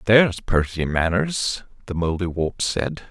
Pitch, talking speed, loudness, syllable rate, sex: 100 Hz, 115 wpm, -22 LUFS, 4.1 syllables/s, male